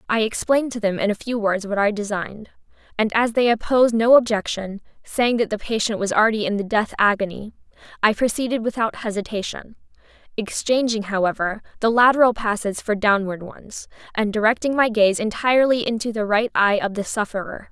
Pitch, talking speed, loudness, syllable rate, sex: 220 Hz, 170 wpm, -20 LUFS, 5.7 syllables/s, female